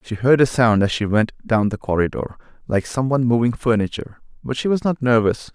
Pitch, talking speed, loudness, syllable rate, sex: 120 Hz, 215 wpm, -19 LUFS, 5.7 syllables/s, male